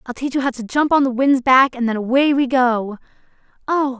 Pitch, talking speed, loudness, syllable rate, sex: 255 Hz, 225 wpm, -17 LUFS, 5.6 syllables/s, female